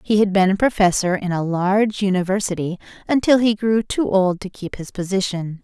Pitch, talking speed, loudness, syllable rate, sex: 195 Hz, 190 wpm, -19 LUFS, 5.3 syllables/s, female